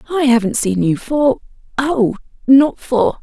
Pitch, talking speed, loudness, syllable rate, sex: 250 Hz, 130 wpm, -15 LUFS, 4.0 syllables/s, female